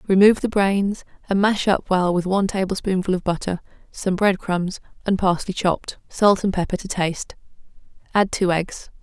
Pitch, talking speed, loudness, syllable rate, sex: 190 Hz, 175 wpm, -21 LUFS, 5.2 syllables/s, female